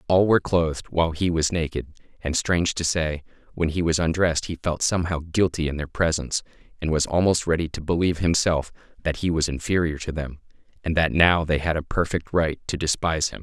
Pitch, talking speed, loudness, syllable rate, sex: 80 Hz, 205 wpm, -23 LUFS, 6.1 syllables/s, male